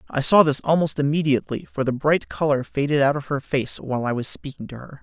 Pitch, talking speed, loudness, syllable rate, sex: 140 Hz, 240 wpm, -21 LUFS, 6.0 syllables/s, male